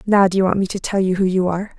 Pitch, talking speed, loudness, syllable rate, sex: 190 Hz, 370 wpm, -18 LUFS, 7.2 syllables/s, female